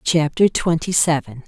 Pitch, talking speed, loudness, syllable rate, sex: 160 Hz, 120 wpm, -18 LUFS, 4.4 syllables/s, female